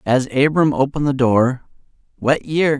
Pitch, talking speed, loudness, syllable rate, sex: 135 Hz, 150 wpm, -17 LUFS, 4.9 syllables/s, male